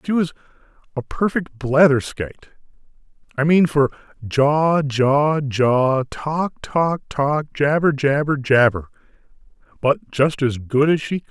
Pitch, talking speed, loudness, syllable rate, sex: 145 Hz, 135 wpm, -19 LUFS, 3.9 syllables/s, male